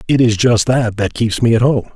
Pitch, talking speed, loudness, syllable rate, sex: 115 Hz, 275 wpm, -14 LUFS, 5.3 syllables/s, male